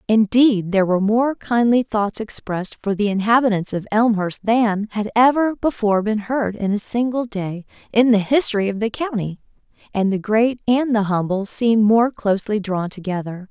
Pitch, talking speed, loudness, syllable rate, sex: 215 Hz, 175 wpm, -19 LUFS, 5.0 syllables/s, female